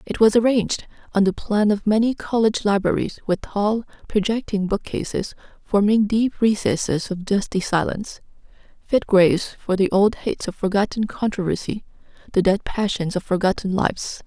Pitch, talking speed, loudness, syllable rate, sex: 205 Hz, 145 wpm, -21 LUFS, 5.2 syllables/s, female